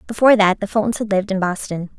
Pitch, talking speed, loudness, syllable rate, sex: 200 Hz, 240 wpm, -18 LUFS, 7.3 syllables/s, female